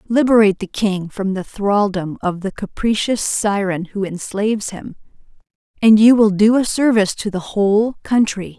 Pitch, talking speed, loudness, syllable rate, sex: 205 Hz, 160 wpm, -17 LUFS, 4.8 syllables/s, female